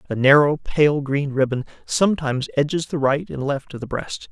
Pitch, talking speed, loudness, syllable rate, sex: 145 Hz, 195 wpm, -20 LUFS, 5.2 syllables/s, male